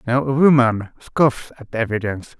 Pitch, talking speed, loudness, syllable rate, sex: 120 Hz, 150 wpm, -18 LUFS, 4.8 syllables/s, male